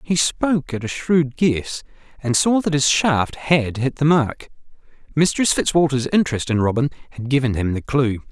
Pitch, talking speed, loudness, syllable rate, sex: 140 Hz, 180 wpm, -19 LUFS, 4.8 syllables/s, male